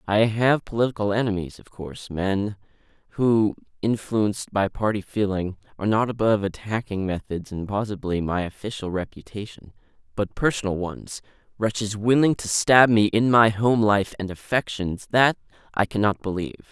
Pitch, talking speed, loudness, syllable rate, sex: 105 Hz, 145 wpm, -23 LUFS, 5.1 syllables/s, male